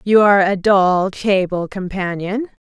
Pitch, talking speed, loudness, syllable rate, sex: 195 Hz, 135 wpm, -16 LUFS, 4.2 syllables/s, female